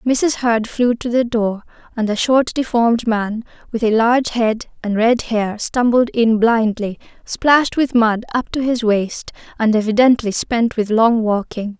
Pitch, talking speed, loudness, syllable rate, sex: 230 Hz, 175 wpm, -17 LUFS, 4.3 syllables/s, female